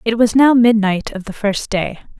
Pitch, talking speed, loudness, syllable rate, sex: 220 Hz, 220 wpm, -15 LUFS, 4.7 syllables/s, female